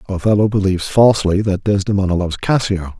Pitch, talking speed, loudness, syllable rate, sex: 100 Hz, 140 wpm, -16 LUFS, 6.4 syllables/s, male